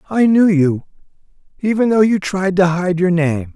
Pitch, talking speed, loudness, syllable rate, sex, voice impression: 185 Hz, 185 wpm, -15 LUFS, 4.6 syllables/s, male, masculine, slightly old, slightly thick, muffled, cool, sincere, slightly calm, elegant, kind